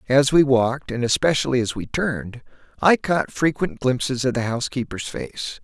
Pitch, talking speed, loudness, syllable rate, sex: 130 Hz, 170 wpm, -21 LUFS, 5.1 syllables/s, male